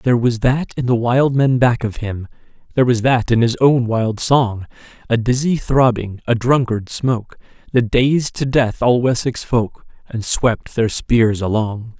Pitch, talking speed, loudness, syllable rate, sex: 120 Hz, 180 wpm, -17 LUFS, 4.3 syllables/s, male